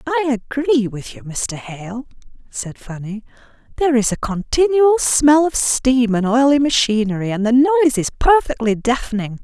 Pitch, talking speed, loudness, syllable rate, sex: 245 Hz, 145 wpm, -16 LUFS, 4.7 syllables/s, female